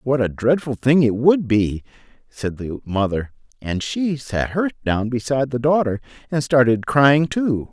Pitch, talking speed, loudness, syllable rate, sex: 130 Hz, 170 wpm, -19 LUFS, 4.3 syllables/s, male